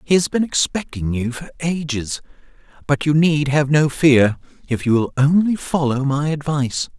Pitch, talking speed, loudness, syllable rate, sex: 145 Hz, 170 wpm, -18 LUFS, 4.7 syllables/s, male